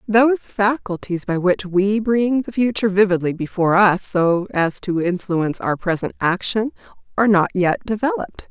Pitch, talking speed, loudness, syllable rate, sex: 195 Hz, 155 wpm, -19 LUFS, 5.1 syllables/s, female